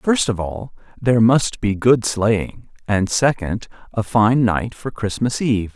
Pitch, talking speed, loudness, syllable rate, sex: 110 Hz, 155 wpm, -19 LUFS, 4.1 syllables/s, male